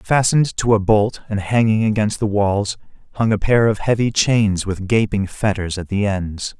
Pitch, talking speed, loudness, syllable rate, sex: 105 Hz, 190 wpm, -18 LUFS, 4.6 syllables/s, male